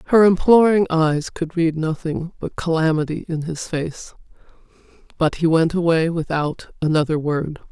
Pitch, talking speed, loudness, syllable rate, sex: 165 Hz, 140 wpm, -19 LUFS, 4.6 syllables/s, female